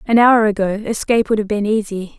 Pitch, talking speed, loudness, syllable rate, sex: 215 Hz, 220 wpm, -16 LUFS, 5.9 syllables/s, female